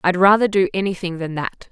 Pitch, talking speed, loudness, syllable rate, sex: 185 Hz, 210 wpm, -18 LUFS, 5.8 syllables/s, female